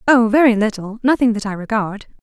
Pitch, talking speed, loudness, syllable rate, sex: 225 Hz, 190 wpm, -17 LUFS, 5.7 syllables/s, female